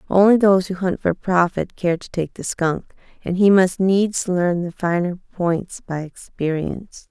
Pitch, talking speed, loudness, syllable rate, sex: 180 Hz, 175 wpm, -20 LUFS, 4.4 syllables/s, female